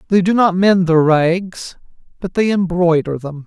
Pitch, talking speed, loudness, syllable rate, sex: 175 Hz, 175 wpm, -15 LUFS, 4.3 syllables/s, male